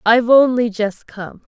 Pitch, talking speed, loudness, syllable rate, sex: 230 Hz, 155 wpm, -15 LUFS, 4.5 syllables/s, female